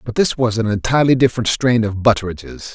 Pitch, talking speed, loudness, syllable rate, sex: 115 Hz, 195 wpm, -16 LUFS, 6.4 syllables/s, male